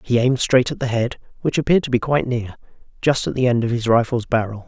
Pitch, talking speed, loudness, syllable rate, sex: 120 Hz, 245 wpm, -19 LUFS, 6.7 syllables/s, male